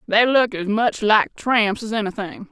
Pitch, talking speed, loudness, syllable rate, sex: 210 Hz, 190 wpm, -19 LUFS, 4.6 syllables/s, female